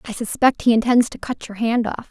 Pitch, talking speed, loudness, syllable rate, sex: 235 Hz, 255 wpm, -19 LUFS, 5.5 syllables/s, female